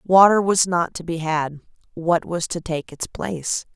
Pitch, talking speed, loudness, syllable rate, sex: 170 Hz, 190 wpm, -21 LUFS, 4.2 syllables/s, female